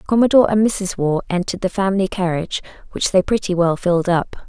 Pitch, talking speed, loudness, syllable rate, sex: 190 Hz, 190 wpm, -18 LUFS, 6.4 syllables/s, female